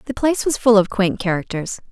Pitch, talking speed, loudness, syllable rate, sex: 215 Hz, 220 wpm, -18 LUFS, 6.0 syllables/s, female